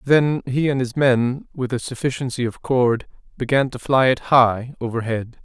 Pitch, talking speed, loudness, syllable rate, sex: 125 Hz, 175 wpm, -20 LUFS, 4.6 syllables/s, male